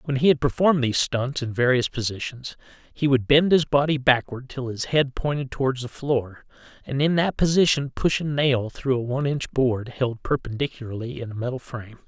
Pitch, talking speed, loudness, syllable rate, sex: 130 Hz, 200 wpm, -23 LUFS, 5.4 syllables/s, male